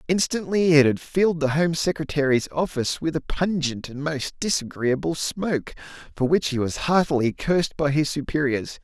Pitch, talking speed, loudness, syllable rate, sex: 150 Hz, 165 wpm, -23 LUFS, 5.2 syllables/s, male